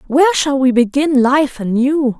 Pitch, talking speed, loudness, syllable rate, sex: 270 Hz, 165 wpm, -14 LUFS, 4.7 syllables/s, female